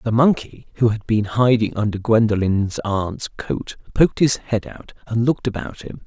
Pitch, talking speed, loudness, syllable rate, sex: 115 Hz, 180 wpm, -20 LUFS, 4.8 syllables/s, male